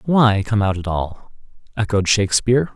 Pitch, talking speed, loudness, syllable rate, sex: 105 Hz, 155 wpm, -18 LUFS, 5.3 syllables/s, male